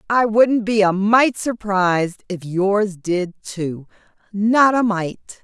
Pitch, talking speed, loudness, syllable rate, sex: 205 Hz, 135 wpm, -18 LUFS, 3.2 syllables/s, female